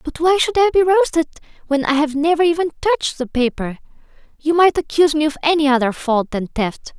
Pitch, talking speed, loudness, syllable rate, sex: 305 Hz, 205 wpm, -17 LUFS, 5.8 syllables/s, female